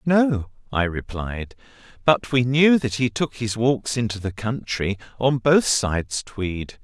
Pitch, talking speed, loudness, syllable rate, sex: 120 Hz, 160 wpm, -22 LUFS, 3.8 syllables/s, male